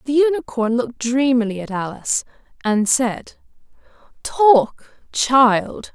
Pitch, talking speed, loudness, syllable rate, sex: 250 Hz, 100 wpm, -18 LUFS, 3.8 syllables/s, female